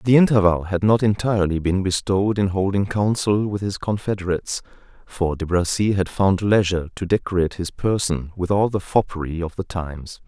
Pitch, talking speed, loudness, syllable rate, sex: 95 Hz, 175 wpm, -21 LUFS, 5.5 syllables/s, male